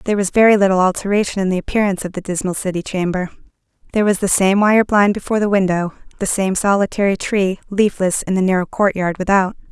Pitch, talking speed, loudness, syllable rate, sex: 195 Hz, 200 wpm, -17 LUFS, 6.5 syllables/s, female